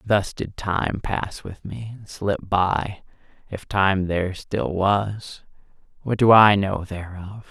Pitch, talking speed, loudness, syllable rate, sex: 100 Hz, 150 wpm, -22 LUFS, 3.4 syllables/s, male